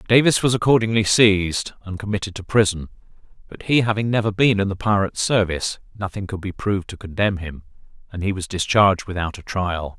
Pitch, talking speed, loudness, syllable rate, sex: 100 Hz, 185 wpm, -20 LUFS, 6.0 syllables/s, male